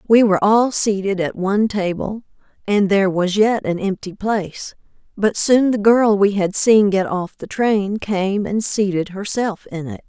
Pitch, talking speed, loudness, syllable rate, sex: 205 Hz, 185 wpm, -18 LUFS, 4.5 syllables/s, female